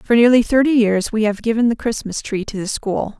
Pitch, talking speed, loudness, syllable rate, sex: 225 Hz, 245 wpm, -17 LUFS, 5.4 syllables/s, female